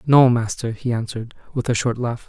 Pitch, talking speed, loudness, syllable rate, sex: 120 Hz, 210 wpm, -21 LUFS, 5.6 syllables/s, male